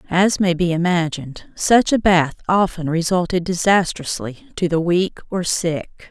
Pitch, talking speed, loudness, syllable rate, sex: 175 Hz, 150 wpm, -18 LUFS, 4.3 syllables/s, female